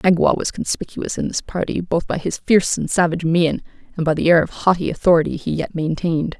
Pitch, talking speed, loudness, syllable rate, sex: 170 Hz, 215 wpm, -19 LUFS, 6.0 syllables/s, female